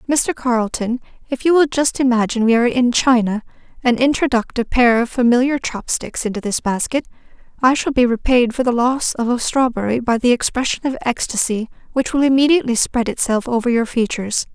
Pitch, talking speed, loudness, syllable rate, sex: 245 Hz, 180 wpm, -17 LUFS, 5.7 syllables/s, female